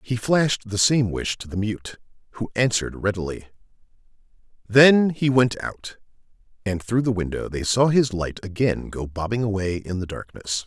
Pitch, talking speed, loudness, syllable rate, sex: 110 Hz, 170 wpm, -22 LUFS, 4.9 syllables/s, male